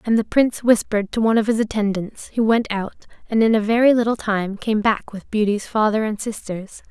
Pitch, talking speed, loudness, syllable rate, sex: 215 Hz, 215 wpm, -20 LUFS, 5.7 syllables/s, female